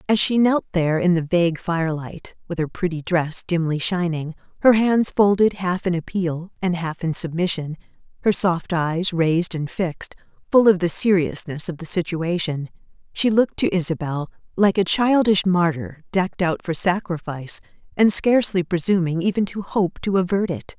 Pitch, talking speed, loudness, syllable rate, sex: 175 Hz, 165 wpm, -21 LUFS, 5.0 syllables/s, female